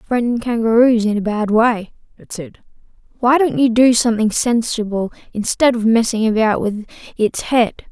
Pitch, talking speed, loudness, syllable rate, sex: 225 Hz, 160 wpm, -16 LUFS, 4.6 syllables/s, male